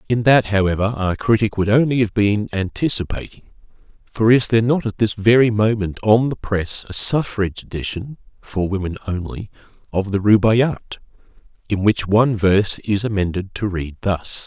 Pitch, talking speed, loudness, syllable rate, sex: 105 Hz, 160 wpm, -18 LUFS, 4.8 syllables/s, male